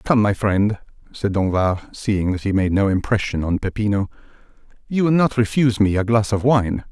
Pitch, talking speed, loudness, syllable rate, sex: 105 Hz, 190 wpm, -19 LUFS, 5.2 syllables/s, male